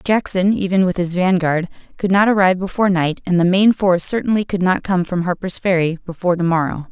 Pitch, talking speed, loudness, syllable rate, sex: 185 Hz, 210 wpm, -17 LUFS, 6.1 syllables/s, female